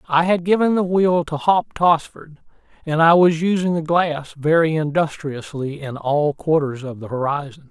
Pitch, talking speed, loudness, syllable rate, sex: 155 Hz, 170 wpm, -19 LUFS, 4.5 syllables/s, male